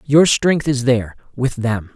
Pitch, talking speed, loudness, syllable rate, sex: 130 Hz, 155 wpm, -17 LUFS, 4.2 syllables/s, male